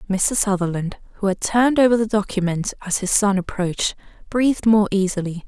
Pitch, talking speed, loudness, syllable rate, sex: 200 Hz, 165 wpm, -20 LUFS, 5.7 syllables/s, female